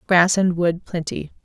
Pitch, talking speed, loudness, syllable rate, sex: 175 Hz, 165 wpm, -20 LUFS, 4.2 syllables/s, female